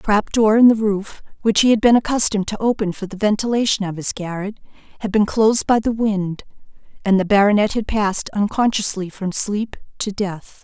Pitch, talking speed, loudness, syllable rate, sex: 210 Hz, 195 wpm, -18 LUFS, 5.5 syllables/s, female